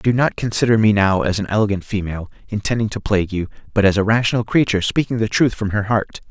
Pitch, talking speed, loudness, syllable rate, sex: 105 Hz, 230 wpm, -18 LUFS, 6.8 syllables/s, male